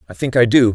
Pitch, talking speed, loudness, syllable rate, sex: 120 Hz, 325 wpm, -15 LUFS, 7.0 syllables/s, male